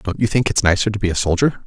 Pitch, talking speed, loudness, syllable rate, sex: 100 Hz, 325 wpm, -18 LUFS, 7.0 syllables/s, male